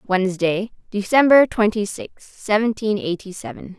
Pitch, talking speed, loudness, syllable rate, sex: 200 Hz, 110 wpm, -19 LUFS, 4.5 syllables/s, female